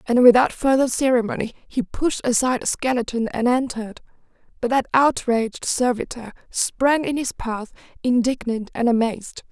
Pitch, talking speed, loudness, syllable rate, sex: 245 Hz, 140 wpm, -21 LUFS, 5.1 syllables/s, female